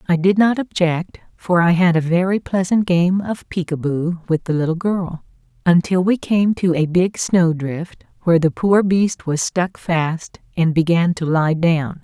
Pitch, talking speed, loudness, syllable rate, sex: 175 Hz, 195 wpm, -18 LUFS, 4.2 syllables/s, female